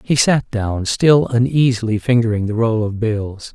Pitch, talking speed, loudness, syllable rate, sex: 115 Hz, 170 wpm, -17 LUFS, 4.4 syllables/s, male